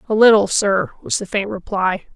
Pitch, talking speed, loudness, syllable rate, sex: 195 Hz, 195 wpm, -17 LUFS, 5.0 syllables/s, female